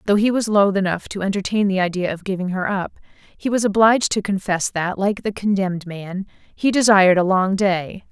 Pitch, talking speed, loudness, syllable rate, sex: 195 Hz, 205 wpm, -19 LUFS, 5.4 syllables/s, female